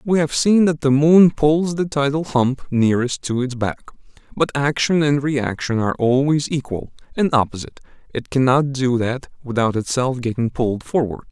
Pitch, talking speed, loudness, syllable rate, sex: 135 Hz, 165 wpm, -19 LUFS, 4.9 syllables/s, male